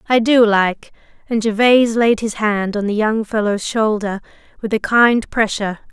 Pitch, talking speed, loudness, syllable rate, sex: 215 Hz, 170 wpm, -16 LUFS, 4.7 syllables/s, female